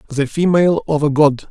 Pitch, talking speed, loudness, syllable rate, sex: 150 Hz, 200 wpm, -15 LUFS, 5.6 syllables/s, male